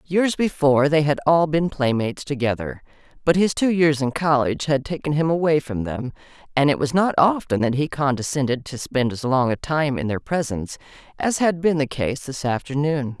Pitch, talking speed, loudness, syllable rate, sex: 145 Hz, 200 wpm, -21 LUFS, 5.3 syllables/s, female